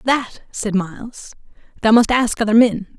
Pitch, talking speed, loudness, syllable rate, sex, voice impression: 225 Hz, 160 wpm, -17 LUFS, 4.4 syllables/s, female, feminine, adult-like, tensed, powerful, clear, fluent, slightly raspy, intellectual, friendly, slightly reassuring, elegant, lively, slightly sharp